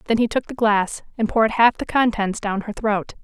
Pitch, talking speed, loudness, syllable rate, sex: 215 Hz, 240 wpm, -20 LUFS, 5.3 syllables/s, female